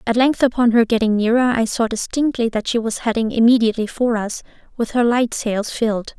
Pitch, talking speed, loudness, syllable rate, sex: 230 Hz, 205 wpm, -18 LUFS, 5.6 syllables/s, female